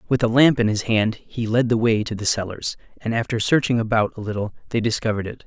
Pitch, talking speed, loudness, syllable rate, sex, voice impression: 115 Hz, 240 wpm, -21 LUFS, 6.2 syllables/s, male, masculine, adult-like, slightly cool, refreshing, slightly calm, slightly unique, slightly kind